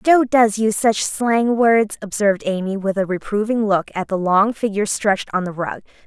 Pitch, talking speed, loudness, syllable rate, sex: 210 Hz, 200 wpm, -18 LUFS, 5.1 syllables/s, female